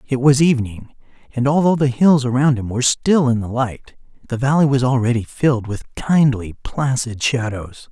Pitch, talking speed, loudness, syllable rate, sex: 130 Hz, 175 wpm, -17 LUFS, 5.1 syllables/s, male